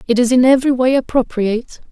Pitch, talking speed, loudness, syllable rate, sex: 245 Hz, 190 wpm, -15 LUFS, 6.5 syllables/s, female